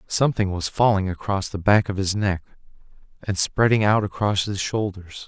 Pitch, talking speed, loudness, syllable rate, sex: 100 Hz, 170 wpm, -22 LUFS, 4.9 syllables/s, male